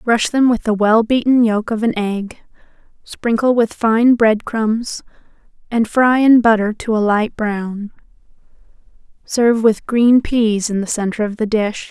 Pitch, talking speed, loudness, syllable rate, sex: 225 Hz, 165 wpm, -16 LUFS, 4.1 syllables/s, female